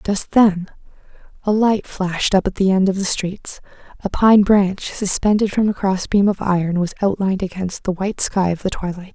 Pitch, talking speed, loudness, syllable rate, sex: 195 Hz, 205 wpm, -18 LUFS, 5.2 syllables/s, female